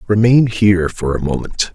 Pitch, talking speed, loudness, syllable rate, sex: 100 Hz, 170 wpm, -15 LUFS, 5.0 syllables/s, male